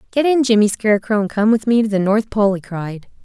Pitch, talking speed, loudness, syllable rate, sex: 215 Hz, 260 wpm, -16 LUFS, 5.9 syllables/s, female